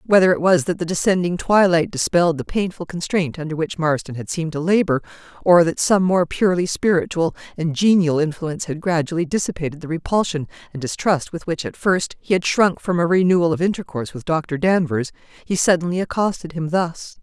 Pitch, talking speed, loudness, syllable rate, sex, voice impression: 170 Hz, 190 wpm, -20 LUFS, 5.7 syllables/s, female, feminine, adult-like, tensed, slightly powerful, hard, slightly raspy, intellectual, calm, reassuring, elegant, lively, sharp